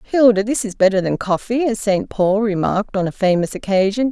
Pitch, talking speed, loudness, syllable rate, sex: 205 Hz, 205 wpm, -18 LUFS, 5.7 syllables/s, female